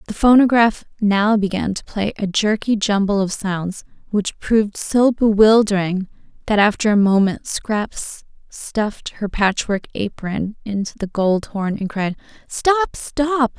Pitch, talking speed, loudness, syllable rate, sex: 210 Hz, 135 wpm, -18 LUFS, 4.0 syllables/s, female